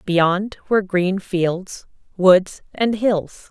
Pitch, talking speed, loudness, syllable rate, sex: 190 Hz, 120 wpm, -19 LUFS, 2.8 syllables/s, female